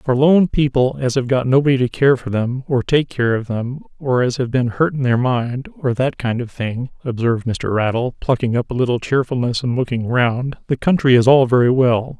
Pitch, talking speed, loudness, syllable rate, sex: 125 Hz, 225 wpm, -17 LUFS, 5.1 syllables/s, male